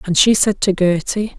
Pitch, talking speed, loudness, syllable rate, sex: 195 Hz, 215 wpm, -15 LUFS, 4.8 syllables/s, female